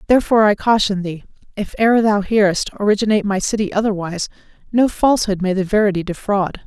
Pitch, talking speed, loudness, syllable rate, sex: 205 Hz, 160 wpm, -17 LUFS, 6.8 syllables/s, female